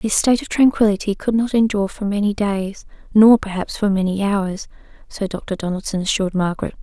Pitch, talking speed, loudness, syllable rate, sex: 205 Hz, 175 wpm, -19 LUFS, 5.8 syllables/s, female